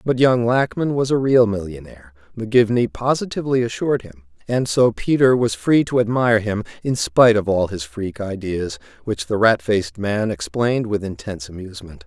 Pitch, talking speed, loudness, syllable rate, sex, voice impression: 110 Hz, 175 wpm, -19 LUFS, 5.5 syllables/s, male, masculine, very adult-like, slightly middle-aged, thick, tensed, slightly powerful, bright, slightly clear, fluent, very intellectual, slightly refreshing, very sincere, very calm, mature, friendly, very reassuring, elegant, slightly wild, sweet, lively, kind, slightly sharp, slightly modest